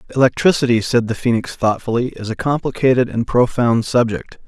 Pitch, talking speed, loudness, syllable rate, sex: 120 Hz, 145 wpm, -17 LUFS, 5.6 syllables/s, male